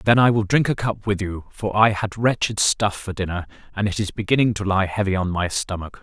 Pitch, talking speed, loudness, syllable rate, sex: 100 Hz, 250 wpm, -21 LUFS, 5.6 syllables/s, male